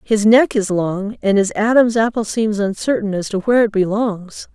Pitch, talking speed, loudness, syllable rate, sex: 210 Hz, 200 wpm, -16 LUFS, 4.8 syllables/s, female